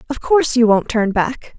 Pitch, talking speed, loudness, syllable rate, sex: 235 Hz, 230 wpm, -16 LUFS, 5.0 syllables/s, female